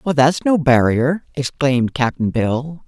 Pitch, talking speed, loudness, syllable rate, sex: 140 Hz, 145 wpm, -17 LUFS, 3.8 syllables/s, female